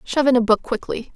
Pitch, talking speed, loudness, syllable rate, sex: 240 Hz, 260 wpm, -19 LUFS, 6.7 syllables/s, female